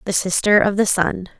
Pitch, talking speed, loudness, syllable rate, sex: 195 Hz, 215 wpm, -17 LUFS, 5.2 syllables/s, female